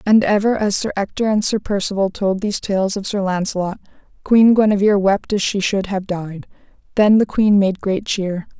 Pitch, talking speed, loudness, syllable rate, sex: 200 Hz, 195 wpm, -17 LUFS, 5.1 syllables/s, female